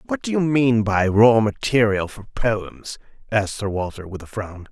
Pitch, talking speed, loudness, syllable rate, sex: 110 Hz, 190 wpm, -20 LUFS, 4.5 syllables/s, male